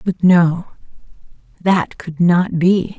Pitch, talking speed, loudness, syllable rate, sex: 175 Hz, 120 wpm, -15 LUFS, 3.0 syllables/s, female